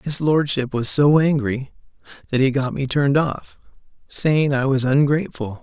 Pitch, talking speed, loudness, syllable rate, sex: 135 Hz, 160 wpm, -19 LUFS, 4.7 syllables/s, male